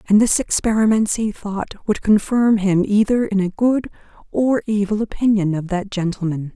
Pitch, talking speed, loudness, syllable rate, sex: 210 Hz, 165 wpm, -18 LUFS, 4.8 syllables/s, female